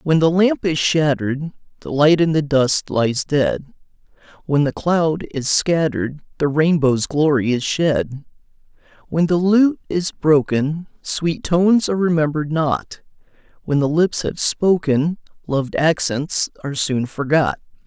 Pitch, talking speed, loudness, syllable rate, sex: 155 Hz, 140 wpm, -18 LUFS, 3.9 syllables/s, male